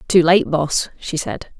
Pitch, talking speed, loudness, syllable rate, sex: 160 Hz, 190 wpm, -18 LUFS, 3.9 syllables/s, female